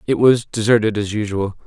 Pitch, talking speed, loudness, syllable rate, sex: 110 Hz, 180 wpm, -18 LUFS, 5.4 syllables/s, male